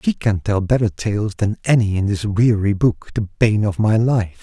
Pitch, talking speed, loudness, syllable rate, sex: 105 Hz, 215 wpm, -18 LUFS, 4.6 syllables/s, male